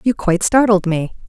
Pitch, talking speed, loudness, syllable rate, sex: 200 Hz, 190 wpm, -16 LUFS, 5.6 syllables/s, female